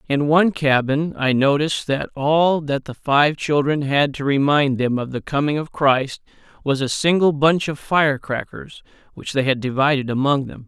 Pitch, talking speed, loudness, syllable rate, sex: 145 Hz, 180 wpm, -19 LUFS, 4.8 syllables/s, male